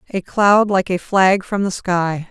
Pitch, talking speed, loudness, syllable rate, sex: 190 Hz, 210 wpm, -16 LUFS, 3.8 syllables/s, female